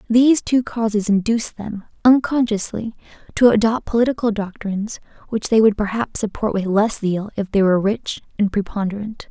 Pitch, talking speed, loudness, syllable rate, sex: 215 Hz, 155 wpm, -19 LUFS, 5.4 syllables/s, female